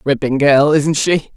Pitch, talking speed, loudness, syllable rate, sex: 145 Hz, 175 wpm, -14 LUFS, 4.1 syllables/s, female